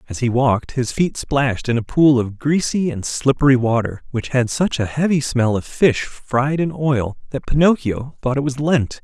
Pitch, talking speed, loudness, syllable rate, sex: 130 Hz, 205 wpm, -18 LUFS, 4.7 syllables/s, male